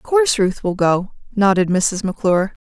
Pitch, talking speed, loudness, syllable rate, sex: 200 Hz, 185 wpm, -17 LUFS, 5.6 syllables/s, female